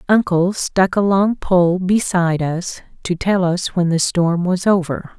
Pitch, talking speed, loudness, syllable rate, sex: 180 Hz, 175 wpm, -17 LUFS, 4.0 syllables/s, female